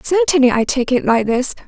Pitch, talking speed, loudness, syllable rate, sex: 270 Hz, 215 wpm, -15 LUFS, 5.4 syllables/s, female